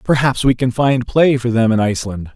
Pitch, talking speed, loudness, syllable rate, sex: 125 Hz, 230 wpm, -15 LUFS, 5.3 syllables/s, male